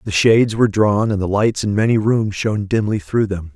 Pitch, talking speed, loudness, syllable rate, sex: 105 Hz, 235 wpm, -17 LUFS, 5.6 syllables/s, male